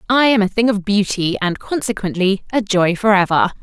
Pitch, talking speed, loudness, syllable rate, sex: 205 Hz, 180 wpm, -17 LUFS, 5.3 syllables/s, female